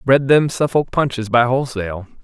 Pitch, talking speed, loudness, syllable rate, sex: 125 Hz, 160 wpm, -17 LUFS, 5.5 syllables/s, male